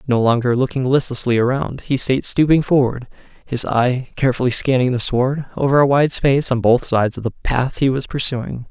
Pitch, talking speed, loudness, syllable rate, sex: 130 Hz, 195 wpm, -17 LUFS, 5.4 syllables/s, male